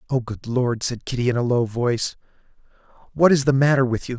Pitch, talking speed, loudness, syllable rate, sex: 125 Hz, 215 wpm, -21 LUFS, 6.0 syllables/s, male